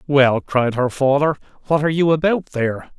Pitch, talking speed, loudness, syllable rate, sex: 140 Hz, 180 wpm, -18 LUFS, 5.3 syllables/s, male